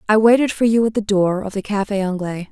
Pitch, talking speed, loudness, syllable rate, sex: 205 Hz, 260 wpm, -18 LUFS, 6.0 syllables/s, female